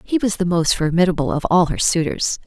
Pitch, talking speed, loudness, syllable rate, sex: 175 Hz, 220 wpm, -18 LUFS, 5.7 syllables/s, female